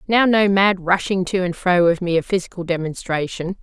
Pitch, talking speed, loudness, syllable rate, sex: 180 Hz, 180 wpm, -19 LUFS, 5.3 syllables/s, female